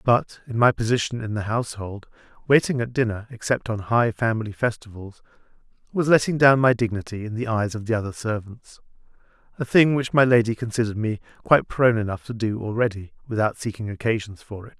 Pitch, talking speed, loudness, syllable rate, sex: 115 Hz, 180 wpm, -22 LUFS, 5.5 syllables/s, male